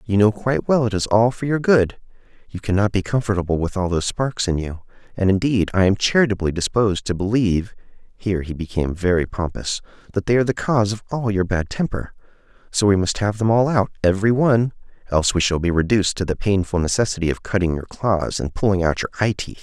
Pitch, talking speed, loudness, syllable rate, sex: 100 Hz, 215 wpm, -20 LUFS, 5.9 syllables/s, male